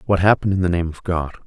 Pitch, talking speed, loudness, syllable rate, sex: 90 Hz, 285 wpm, -19 LUFS, 7.5 syllables/s, male